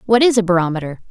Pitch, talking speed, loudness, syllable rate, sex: 195 Hz, 215 wpm, -16 LUFS, 7.8 syllables/s, female